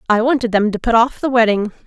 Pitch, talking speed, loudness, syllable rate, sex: 230 Hz, 255 wpm, -15 LUFS, 6.3 syllables/s, female